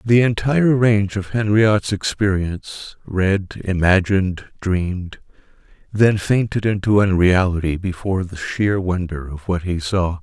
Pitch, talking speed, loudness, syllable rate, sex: 95 Hz, 125 wpm, -19 LUFS, 4.4 syllables/s, male